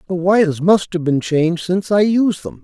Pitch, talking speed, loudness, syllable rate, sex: 185 Hz, 225 wpm, -16 LUFS, 5.4 syllables/s, male